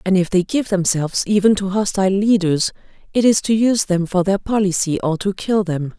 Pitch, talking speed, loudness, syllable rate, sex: 195 Hz, 210 wpm, -18 LUFS, 5.5 syllables/s, female